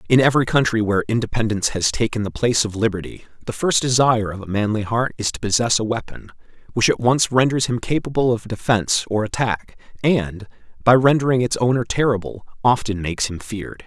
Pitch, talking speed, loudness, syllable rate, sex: 115 Hz, 185 wpm, -19 LUFS, 6.1 syllables/s, male